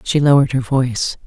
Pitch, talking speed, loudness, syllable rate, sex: 130 Hz, 190 wpm, -16 LUFS, 6.3 syllables/s, female